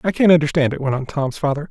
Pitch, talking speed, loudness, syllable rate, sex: 150 Hz, 280 wpm, -18 LUFS, 6.8 syllables/s, male